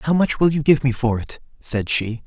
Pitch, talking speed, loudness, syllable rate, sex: 135 Hz, 265 wpm, -19 LUFS, 4.9 syllables/s, male